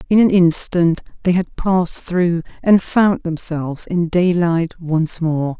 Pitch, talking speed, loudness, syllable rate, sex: 170 Hz, 150 wpm, -17 LUFS, 3.9 syllables/s, female